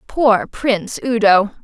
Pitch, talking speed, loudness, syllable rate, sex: 225 Hz, 110 wpm, -16 LUFS, 3.8 syllables/s, female